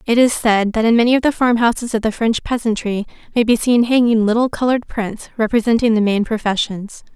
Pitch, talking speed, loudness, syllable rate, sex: 225 Hz, 200 wpm, -16 LUFS, 5.8 syllables/s, female